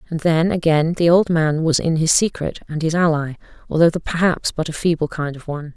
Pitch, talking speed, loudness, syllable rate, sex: 160 Hz, 220 wpm, -18 LUFS, 5.6 syllables/s, female